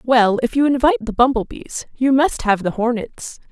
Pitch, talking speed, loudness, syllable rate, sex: 250 Hz, 205 wpm, -17 LUFS, 5.0 syllables/s, female